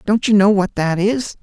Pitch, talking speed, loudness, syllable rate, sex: 205 Hz, 250 wpm, -16 LUFS, 4.7 syllables/s, male